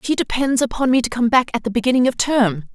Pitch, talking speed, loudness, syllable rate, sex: 245 Hz, 265 wpm, -18 LUFS, 6.1 syllables/s, female